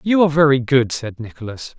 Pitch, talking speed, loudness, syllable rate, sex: 135 Hz, 200 wpm, -16 LUFS, 5.9 syllables/s, male